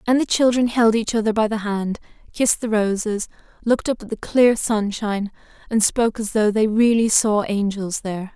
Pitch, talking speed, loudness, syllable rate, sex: 220 Hz, 195 wpm, -20 LUFS, 5.4 syllables/s, female